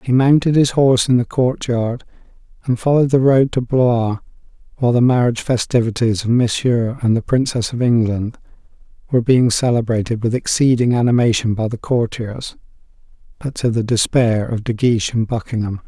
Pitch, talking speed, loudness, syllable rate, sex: 120 Hz, 160 wpm, -17 LUFS, 5.4 syllables/s, male